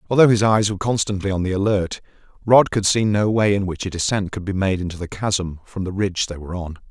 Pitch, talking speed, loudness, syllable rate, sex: 100 Hz, 250 wpm, -20 LUFS, 6.2 syllables/s, male